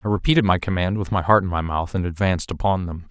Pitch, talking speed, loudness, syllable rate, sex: 95 Hz, 270 wpm, -21 LUFS, 6.7 syllables/s, male